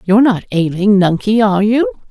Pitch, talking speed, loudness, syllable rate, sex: 210 Hz, 170 wpm, -13 LUFS, 5.6 syllables/s, female